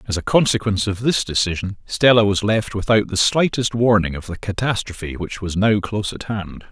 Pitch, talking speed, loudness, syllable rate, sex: 105 Hz, 195 wpm, -19 LUFS, 5.5 syllables/s, male